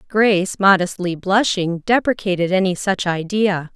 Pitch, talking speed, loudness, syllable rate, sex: 190 Hz, 110 wpm, -18 LUFS, 4.5 syllables/s, female